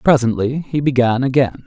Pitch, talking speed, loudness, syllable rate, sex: 130 Hz, 145 wpm, -17 LUFS, 5.1 syllables/s, male